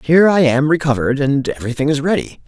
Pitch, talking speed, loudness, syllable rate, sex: 145 Hz, 195 wpm, -15 LUFS, 6.8 syllables/s, male